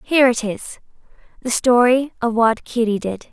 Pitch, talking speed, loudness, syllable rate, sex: 240 Hz, 145 wpm, -18 LUFS, 4.8 syllables/s, female